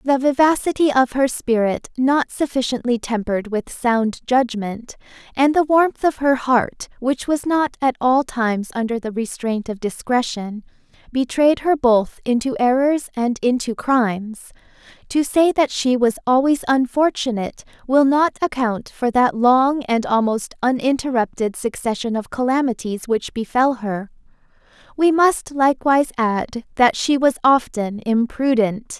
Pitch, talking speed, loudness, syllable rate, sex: 250 Hz, 140 wpm, -19 LUFS, 4.4 syllables/s, female